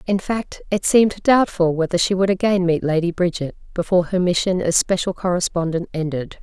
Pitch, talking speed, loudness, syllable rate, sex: 180 Hz, 180 wpm, -19 LUFS, 5.6 syllables/s, female